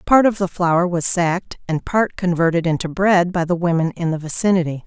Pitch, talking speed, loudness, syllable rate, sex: 175 Hz, 210 wpm, -18 LUFS, 5.4 syllables/s, female